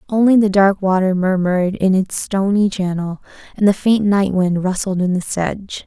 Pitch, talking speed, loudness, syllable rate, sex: 190 Hz, 185 wpm, -16 LUFS, 4.9 syllables/s, female